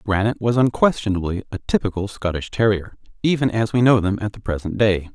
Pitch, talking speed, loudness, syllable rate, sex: 105 Hz, 185 wpm, -20 LUFS, 6.0 syllables/s, male